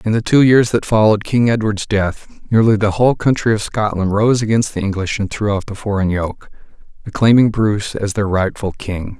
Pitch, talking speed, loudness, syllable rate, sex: 105 Hz, 200 wpm, -16 LUFS, 5.4 syllables/s, male